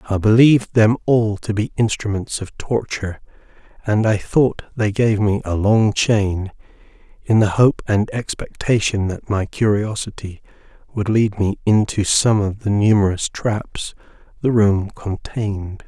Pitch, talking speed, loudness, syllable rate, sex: 105 Hz, 145 wpm, -18 LUFS, 4.2 syllables/s, male